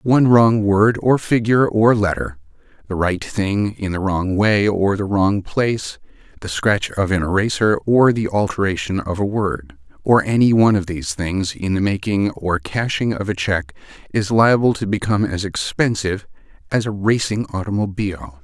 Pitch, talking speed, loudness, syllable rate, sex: 100 Hz, 165 wpm, -18 LUFS, 4.8 syllables/s, male